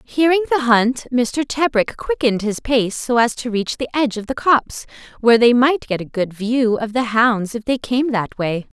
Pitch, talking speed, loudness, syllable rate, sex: 240 Hz, 220 wpm, -18 LUFS, 4.9 syllables/s, female